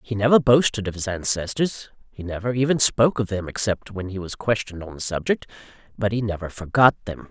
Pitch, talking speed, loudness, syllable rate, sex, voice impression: 105 Hz, 205 wpm, -22 LUFS, 5.9 syllables/s, male, masculine, adult-like, tensed, clear, fluent, intellectual, friendly, unique, lively, slightly sharp, slightly light